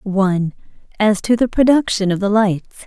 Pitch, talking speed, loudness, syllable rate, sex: 205 Hz, 170 wpm, -16 LUFS, 5.8 syllables/s, female